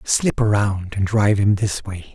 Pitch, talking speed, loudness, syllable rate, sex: 105 Hz, 195 wpm, -19 LUFS, 4.5 syllables/s, male